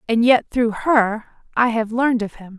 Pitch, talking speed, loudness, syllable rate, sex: 230 Hz, 210 wpm, -18 LUFS, 4.7 syllables/s, female